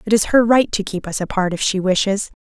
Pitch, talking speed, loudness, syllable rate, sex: 200 Hz, 265 wpm, -18 LUFS, 5.8 syllables/s, female